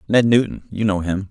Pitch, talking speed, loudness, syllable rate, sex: 105 Hz, 230 wpm, -19 LUFS, 5.7 syllables/s, male